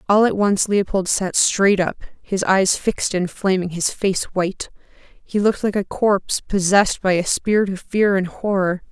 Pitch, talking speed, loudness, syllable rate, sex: 195 Hz, 190 wpm, -19 LUFS, 4.7 syllables/s, female